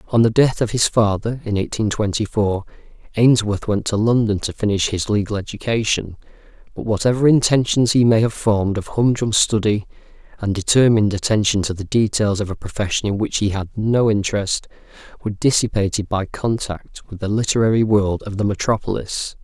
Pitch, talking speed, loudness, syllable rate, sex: 105 Hz, 170 wpm, -19 LUFS, 5.5 syllables/s, male